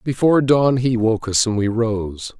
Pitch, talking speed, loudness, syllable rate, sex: 115 Hz, 200 wpm, -18 LUFS, 4.4 syllables/s, male